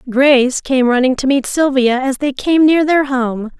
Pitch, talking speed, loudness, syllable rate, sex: 265 Hz, 200 wpm, -14 LUFS, 4.5 syllables/s, female